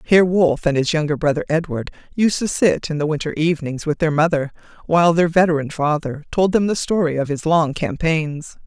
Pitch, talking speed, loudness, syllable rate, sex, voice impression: 160 Hz, 200 wpm, -19 LUFS, 5.6 syllables/s, female, feminine, adult-like, slightly fluent, sincere, slightly calm, friendly, slightly reassuring